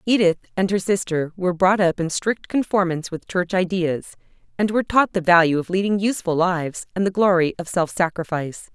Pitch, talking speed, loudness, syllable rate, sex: 180 Hz, 190 wpm, -21 LUFS, 5.8 syllables/s, female